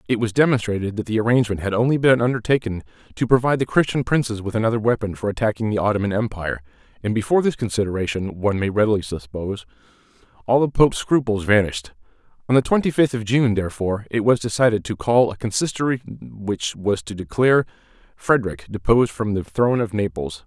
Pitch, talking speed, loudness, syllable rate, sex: 110 Hz, 180 wpm, -20 LUFS, 6.6 syllables/s, male